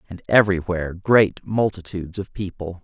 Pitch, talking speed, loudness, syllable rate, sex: 95 Hz, 125 wpm, -21 LUFS, 5.5 syllables/s, male